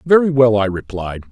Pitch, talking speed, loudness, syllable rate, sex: 120 Hz, 185 wpm, -16 LUFS, 5.2 syllables/s, male